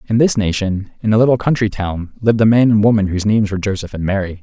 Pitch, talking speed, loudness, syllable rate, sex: 105 Hz, 270 wpm, -16 LUFS, 7.4 syllables/s, male